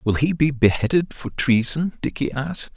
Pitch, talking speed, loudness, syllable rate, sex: 140 Hz, 175 wpm, -21 LUFS, 4.9 syllables/s, male